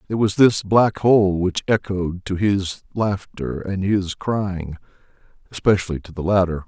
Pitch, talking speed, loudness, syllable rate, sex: 95 Hz, 155 wpm, -20 LUFS, 4.1 syllables/s, male